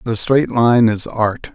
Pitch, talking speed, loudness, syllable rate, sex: 115 Hz, 195 wpm, -15 LUFS, 3.5 syllables/s, male